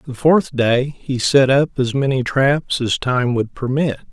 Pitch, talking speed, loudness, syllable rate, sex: 130 Hz, 190 wpm, -17 LUFS, 3.9 syllables/s, male